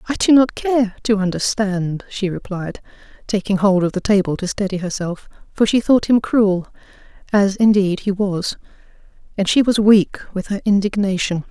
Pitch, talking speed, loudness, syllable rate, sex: 200 Hz, 155 wpm, -18 LUFS, 4.8 syllables/s, female